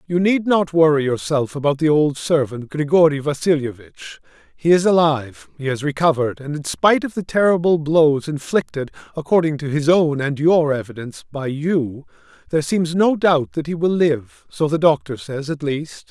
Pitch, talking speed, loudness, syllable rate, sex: 150 Hz, 180 wpm, -18 LUFS, 5.0 syllables/s, male